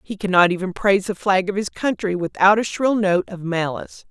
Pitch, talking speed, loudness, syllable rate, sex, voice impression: 190 Hz, 220 wpm, -19 LUFS, 5.6 syllables/s, female, feminine, slightly middle-aged, slightly powerful, clear, slightly sharp